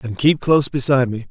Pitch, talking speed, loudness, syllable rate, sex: 130 Hz, 230 wpm, -17 LUFS, 6.4 syllables/s, male